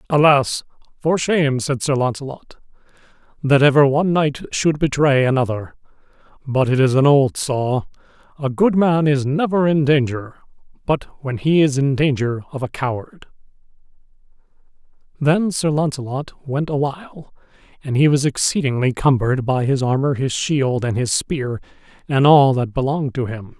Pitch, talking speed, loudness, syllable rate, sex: 140 Hz, 150 wpm, -18 LUFS, 4.9 syllables/s, male